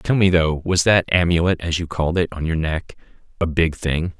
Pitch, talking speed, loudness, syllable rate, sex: 85 Hz, 230 wpm, -19 LUFS, 4.9 syllables/s, male